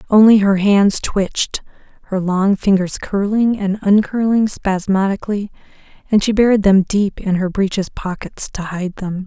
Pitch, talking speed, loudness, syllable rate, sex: 200 Hz, 150 wpm, -16 LUFS, 4.5 syllables/s, female